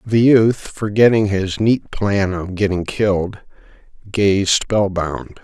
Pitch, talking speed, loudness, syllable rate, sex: 100 Hz, 135 wpm, -17 LUFS, 3.4 syllables/s, male